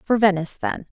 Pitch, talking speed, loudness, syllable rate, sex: 200 Hz, 180 wpm, -22 LUFS, 6.6 syllables/s, female